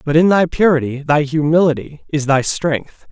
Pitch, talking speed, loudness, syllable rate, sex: 150 Hz, 175 wpm, -16 LUFS, 4.7 syllables/s, male